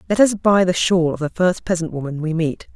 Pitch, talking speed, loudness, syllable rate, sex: 175 Hz, 260 wpm, -18 LUFS, 5.5 syllables/s, female